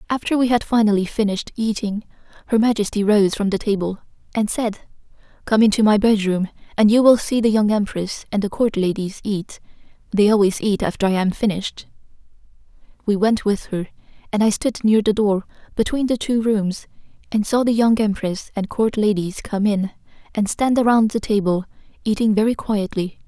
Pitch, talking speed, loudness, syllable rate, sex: 210 Hz, 180 wpm, -19 LUFS, 5.3 syllables/s, female